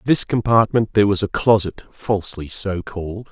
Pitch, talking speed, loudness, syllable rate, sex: 105 Hz, 180 wpm, -19 LUFS, 5.3 syllables/s, male